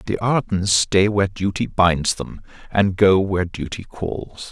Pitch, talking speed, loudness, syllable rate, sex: 95 Hz, 160 wpm, -20 LUFS, 4.2 syllables/s, male